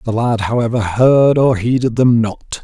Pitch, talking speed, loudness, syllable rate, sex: 120 Hz, 180 wpm, -14 LUFS, 4.4 syllables/s, male